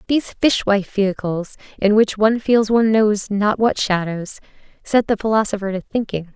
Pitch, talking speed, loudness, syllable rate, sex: 210 Hz, 160 wpm, -18 LUFS, 5.3 syllables/s, female